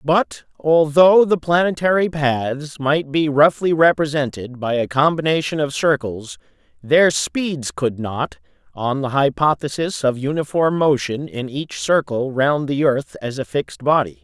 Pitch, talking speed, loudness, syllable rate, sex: 145 Hz, 145 wpm, -18 LUFS, 4.2 syllables/s, male